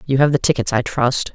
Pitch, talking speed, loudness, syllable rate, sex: 130 Hz, 270 wpm, -17 LUFS, 5.6 syllables/s, female